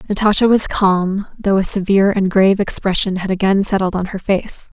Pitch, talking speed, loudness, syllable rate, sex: 195 Hz, 190 wpm, -15 LUFS, 5.4 syllables/s, female